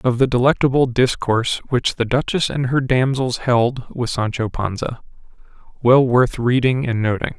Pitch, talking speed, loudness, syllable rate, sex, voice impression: 125 Hz, 155 wpm, -18 LUFS, 4.7 syllables/s, male, masculine, adult-like, tensed, clear, fluent, cool, intellectual, sincere, calm, friendly, reassuring, wild, lively, slightly kind